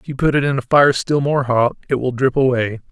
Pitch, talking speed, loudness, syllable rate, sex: 130 Hz, 290 wpm, -17 LUFS, 5.6 syllables/s, male